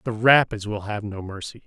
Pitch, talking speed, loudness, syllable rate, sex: 110 Hz, 215 wpm, -22 LUFS, 5.2 syllables/s, male